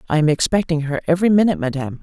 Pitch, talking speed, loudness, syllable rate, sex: 165 Hz, 205 wpm, -18 LUFS, 8.5 syllables/s, female